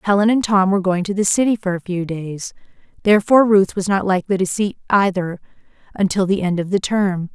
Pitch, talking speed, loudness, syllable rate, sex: 190 Hz, 210 wpm, -18 LUFS, 6.0 syllables/s, female